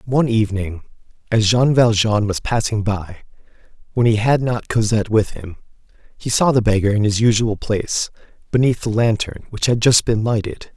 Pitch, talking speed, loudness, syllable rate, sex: 110 Hz, 175 wpm, -18 LUFS, 5.3 syllables/s, male